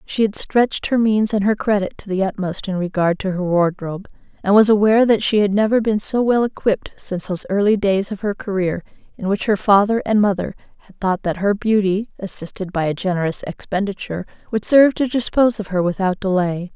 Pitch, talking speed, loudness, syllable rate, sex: 200 Hz, 210 wpm, -19 LUFS, 5.9 syllables/s, female